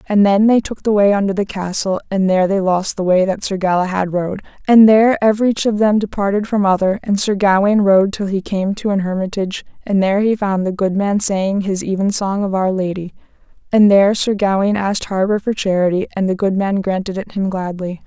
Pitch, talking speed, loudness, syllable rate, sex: 195 Hz, 220 wpm, -16 LUFS, 5.7 syllables/s, female